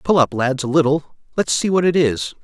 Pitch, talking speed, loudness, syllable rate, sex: 150 Hz, 245 wpm, -18 LUFS, 5.3 syllables/s, male